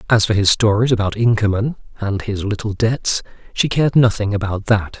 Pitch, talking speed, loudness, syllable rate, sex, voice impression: 110 Hz, 180 wpm, -17 LUFS, 5.4 syllables/s, male, very masculine, very adult-like, old, very thick, slightly relaxed, very powerful, dark, slightly soft, muffled, fluent, raspy, very cool, very intellectual, sincere, very calm, very mature, very friendly, very reassuring, very unique, slightly elegant, very wild, slightly sweet, slightly lively, very kind, slightly modest